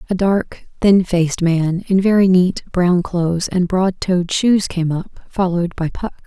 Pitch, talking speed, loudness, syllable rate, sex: 180 Hz, 180 wpm, -17 LUFS, 4.3 syllables/s, female